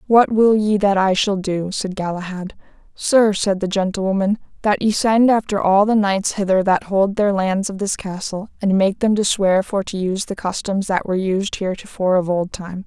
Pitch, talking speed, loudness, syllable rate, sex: 195 Hz, 210 wpm, -18 LUFS, 5.0 syllables/s, female